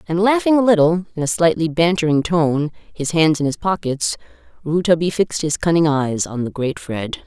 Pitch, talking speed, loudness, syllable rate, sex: 165 Hz, 190 wpm, -18 LUFS, 5.4 syllables/s, female